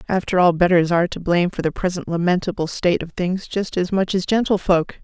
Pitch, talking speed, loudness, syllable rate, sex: 180 Hz, 215 wpm, -20 LUFS, 6.0 syllables/s, female